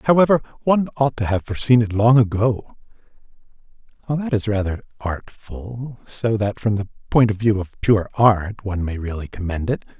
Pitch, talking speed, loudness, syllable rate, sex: 110 Hz, 170 wpm, -20 LUFS, 5.1 syllables/s, male